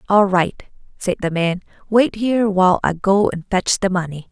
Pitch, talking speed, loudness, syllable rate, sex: 190 Hz, 195 wpm, -18 LUFS, 4.9 syllables/s, female